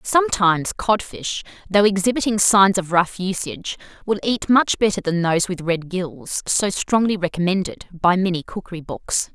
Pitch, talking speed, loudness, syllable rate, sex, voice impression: 190 Hz, 155 wpm, -20 LUFS, 5.0 syllables/s, female, very feminine, slightly young, slightly adult-like, very thin, very tensed, powerful, very bright, hard, very clear, very fluent, cool, slightly intellectual, very refreshing, sincere, slightly calm, very friendly, slightly reassuring, very wild, slightly sweet, very lively, strict, intense, sharp